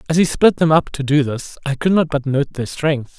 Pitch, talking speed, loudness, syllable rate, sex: 150 Hz, 280 wpm, -17 LUFS, 5.1 syllables/s, male